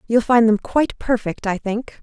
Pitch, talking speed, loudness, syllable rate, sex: 225 Hz, 205 wpm, -19 LUFS, 5.0 syllables/s, female